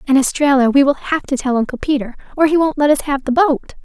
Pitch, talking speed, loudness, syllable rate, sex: 280 Hz, 265 wpm, -15 LUFS, 6.6 syllables/s, female